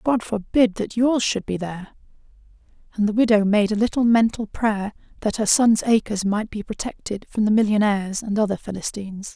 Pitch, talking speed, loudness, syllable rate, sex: 215 Hz, 180 wpm, -21 LUFS, 5.4 syllables/s, female